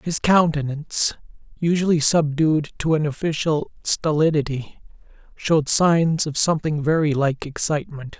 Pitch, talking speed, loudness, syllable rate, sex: 155 Hz, 110 wpm, -20 LUFS, 4.7 syllables/s, male